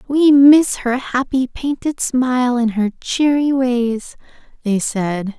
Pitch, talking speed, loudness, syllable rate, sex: 250 Hz, 135 wpm, -16 LUFS, 3.4 syllables/s, female